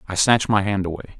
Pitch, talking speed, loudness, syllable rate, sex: 100 Hz, 250 wpm, -20 LUFS, 7.8 syllables/s, male